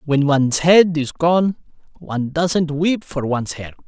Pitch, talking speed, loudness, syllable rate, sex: 155 Hz, 170 wpm, -18 LUFS, 4.4 syllables/s, male